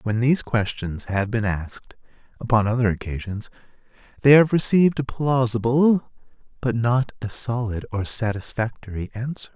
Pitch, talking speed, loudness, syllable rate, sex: 115 Hz, 130 wpm, -22 LUFS, 5.0 syllables/s, male